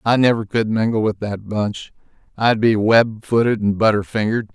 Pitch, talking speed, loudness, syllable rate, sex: 110 Hz, 185 wpm, -18 LUFS, 5.0 syllables/s, male